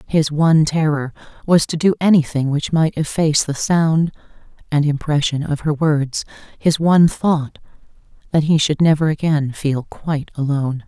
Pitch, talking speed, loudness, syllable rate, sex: 150 Hz, 155 wpm, -17 LUFS, 4.9 syllables/s, female